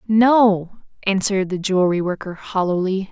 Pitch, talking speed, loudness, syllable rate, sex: 195 Hz, 115 wpm, -19 LUFS, 4.9 syllables/s, female